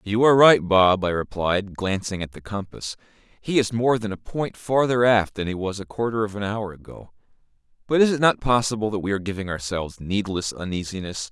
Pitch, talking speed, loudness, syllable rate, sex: 105 Hz, 205 wpm, -22 LUFS, 5.5 syllables/s, male